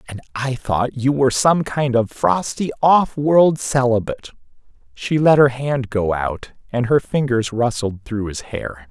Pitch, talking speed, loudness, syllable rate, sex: 125 Hz, 160 wpm, -18 LUFS, 4.1 syllables/s, male